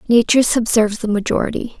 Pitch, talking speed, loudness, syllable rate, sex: 225 Hz, 135 wpm, -16 LUFS, 6.8 syllables/s, female